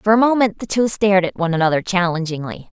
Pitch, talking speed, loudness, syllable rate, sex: 190 Hz, 215 wpm, -17 LUFS, 6.7 syllables/s, female